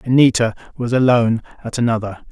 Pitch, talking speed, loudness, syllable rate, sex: 115 Hz, 130 wpm, -17 LUFS, 6.3 syllables/s, male